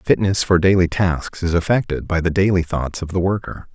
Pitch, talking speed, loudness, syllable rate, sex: 90 Hz, 210 wpm, -19 LUFS, 5.2 syllables/s, male